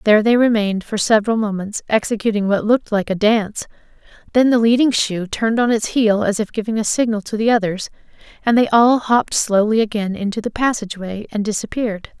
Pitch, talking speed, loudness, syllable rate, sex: 215 Hz, 195 wpm, -17 LUFS, 6.1 syllables/s, female